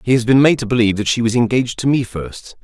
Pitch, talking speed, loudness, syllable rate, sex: 120 Hz, 295 wpm, -16 LUFS, 6.8 syllables/s, male